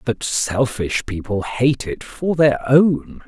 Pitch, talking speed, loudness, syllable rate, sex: 130 Hz, 145 wpm, -19 LUFS, 3.3 syllables/s, male